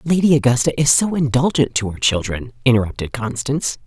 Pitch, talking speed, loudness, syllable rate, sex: 130 Hz, 170 wpm, -18 LUFS, 6.2 syllables/s, female